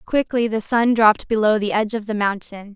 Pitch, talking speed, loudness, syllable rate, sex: 215 Hz, 215 wpm, -19 LUFS, 5.7 syllables/s, female